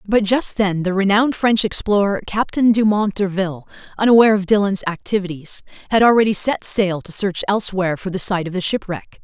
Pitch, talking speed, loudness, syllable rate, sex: 200 Hz, 175 wpm, -17 LUFS, 5.7 syllables/s, female